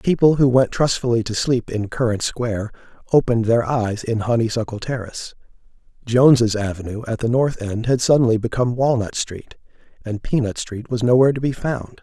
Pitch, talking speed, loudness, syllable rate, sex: 120 Hz, 170 wpm, -19 LUFS, 5.5 syllables/s, male